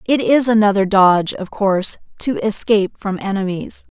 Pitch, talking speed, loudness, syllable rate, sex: 205 Hz, 150 wpm, -16 LUFS, 5.1 syllables/s, female